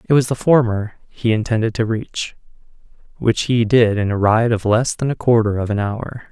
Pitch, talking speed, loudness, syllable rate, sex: 115 Hz, 200 wpm, -18 LUFS, 5.0 syllables/s, male